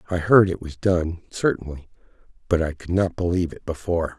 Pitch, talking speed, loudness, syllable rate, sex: 85 Hz, 185 wpm, -22 LUFS, 5.8 syllables/s, male